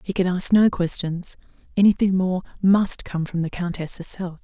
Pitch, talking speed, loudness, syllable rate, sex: 180 Hz, 160 wpm, -21 LUFS, 4.8 syllables/s, female